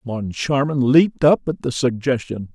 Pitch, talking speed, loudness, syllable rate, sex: 130 Hz, 140 wpm, -18 LUFS, 4.5 syllables/s, male